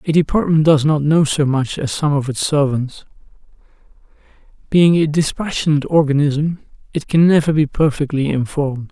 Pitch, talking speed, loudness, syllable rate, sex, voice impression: 150 Hz, 150 wpm, -16 LUFS, 5.3 syllables/s, male, masculine, slightly old, slightly thick, slightly muffled, slightly halting, calm, elegant, slightly sweet, slightly kind